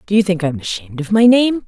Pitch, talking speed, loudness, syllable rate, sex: 195 Hz, 320 wpm, -15 LUFS, 7.2 syllables/s, female